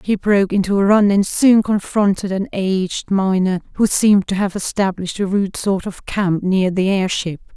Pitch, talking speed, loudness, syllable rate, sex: 195 Hz, 190 wpm, -17 LUFS, 4.9 syllables/s, female